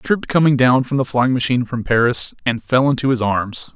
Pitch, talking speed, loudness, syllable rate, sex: 125 Hz, 210 wpm, -17 LUFS, 5.6 syllables/s, male